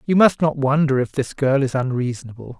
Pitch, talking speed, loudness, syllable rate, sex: 135 Hz, 210 wpm, -19 LUFS, 5.6 syllables/s, male